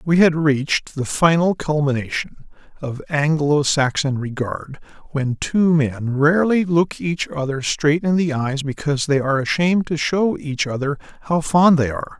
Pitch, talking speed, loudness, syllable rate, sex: 150 Hz, 160 wpm, -19 LUFS, 4.6 syllables/s, male